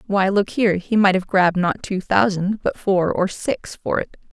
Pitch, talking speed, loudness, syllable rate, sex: 190 Hz, 220 wpm, -20 LUFS, 4.7 syllables/s, female